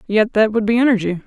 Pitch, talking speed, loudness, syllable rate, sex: 215 Hz, 240 wpm, -16 LUFS, 6.5 syllables/s, female